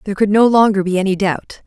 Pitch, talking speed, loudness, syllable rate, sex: 200 Hz, 250 wpm, -14 LUFS, 6.6 syllables/s, female